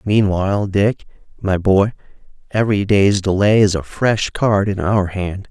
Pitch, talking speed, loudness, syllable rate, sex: 100 Hz, 155 wpm, -17 LUFS, 4.2 syllables/s, male